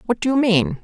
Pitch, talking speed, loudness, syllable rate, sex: 195 Hz, 290 wpm, -18 LUFS, 6.4 syllables/s, female